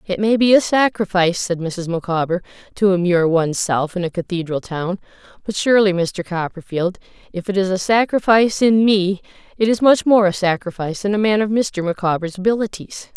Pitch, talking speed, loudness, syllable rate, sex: 190 Hz, 180 wpm, -18 LUFS, 5.6 syllables/s, female